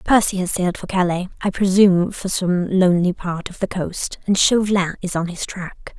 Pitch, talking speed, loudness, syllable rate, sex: 185 Hz, 200 wpm, -19 LUFS, 5.2 syllables/s, female